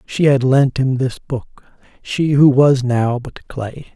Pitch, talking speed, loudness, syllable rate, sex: 130 Hz, 165 wpm, -16 LUFS, 3.5 syllables/s, male